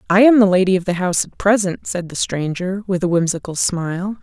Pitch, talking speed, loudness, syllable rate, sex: 185 Hz, 225 wpm, -17 LUFS, 5.7 syllables/s, female